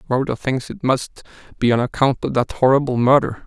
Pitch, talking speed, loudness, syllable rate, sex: 130 Hz, 190 wpm, -18 LUFS, 5.5 syllables/s, male